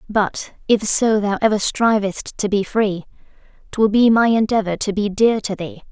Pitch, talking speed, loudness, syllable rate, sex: 210 Hz, 185 wpm, -18 LUFS, 4.5 syllables/s, female